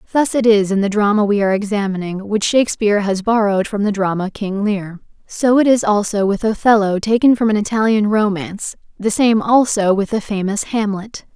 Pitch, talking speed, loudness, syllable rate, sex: 210 Hz, 190 wpm, -16 LUFS, 5.5 syllables/s, female